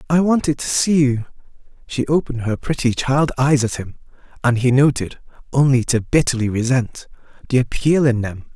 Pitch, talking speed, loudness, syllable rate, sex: 130 Hz, 170 wpm, -18 LUFS, 5.2 syllables/s, male